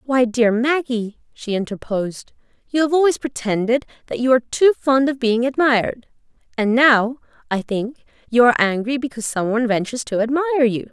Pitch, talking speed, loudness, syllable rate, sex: 245 Hz, 170 wpm, -19 LUFS, 5.5 syllables/s, female